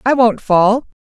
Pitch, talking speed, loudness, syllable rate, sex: 230 Hz, 175 wpm, -13 LUFS, 3.8 syllables/s, female